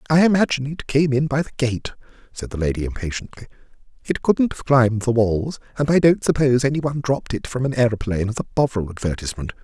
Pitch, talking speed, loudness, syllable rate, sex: 125 Hz, 200 wpm, -20 LUFS, 6.6 syllables/s, male